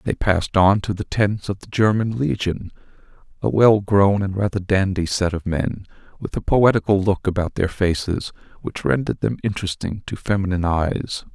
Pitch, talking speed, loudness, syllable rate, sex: 95 Hz, 175 wpm, -20 LUFS, 5.1 syllables/s, male